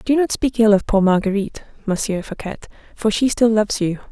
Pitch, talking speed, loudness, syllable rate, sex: 215 Hz, 205 wpm, -18 LUFS, 6.0 syllables/s, female